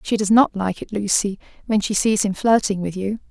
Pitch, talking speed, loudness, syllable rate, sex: 205 Hz, 235 wpm, -20 LUFS, 5.3 syllables/s, female